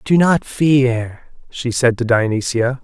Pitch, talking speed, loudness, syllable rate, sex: 125 Hz, 150 wpm, -16 LUFS, 3.5 syllables/s, male